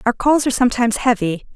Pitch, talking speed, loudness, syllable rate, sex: 235 Hz, 195 wpm, -17 LUFS, 7.4 syllables/s, female